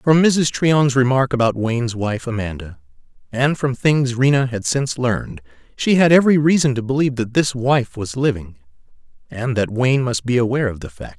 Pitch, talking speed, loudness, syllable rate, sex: 125 Hz, 190 wpm, -18 LUFS, 5.2 syllables/s, male